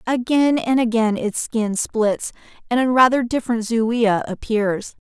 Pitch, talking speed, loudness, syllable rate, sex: 230 Hz, 140 wpm, -19 LUFS, 4.1 syllables/s, female